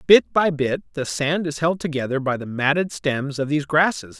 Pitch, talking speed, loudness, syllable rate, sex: 150 Hz, 215 wpm, -21 LUFS, 5.1 syllables/s, male